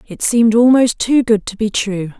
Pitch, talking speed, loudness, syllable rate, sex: 220 Hz, 220 wpm, -14 LUFS, 5.0 syllables/s, female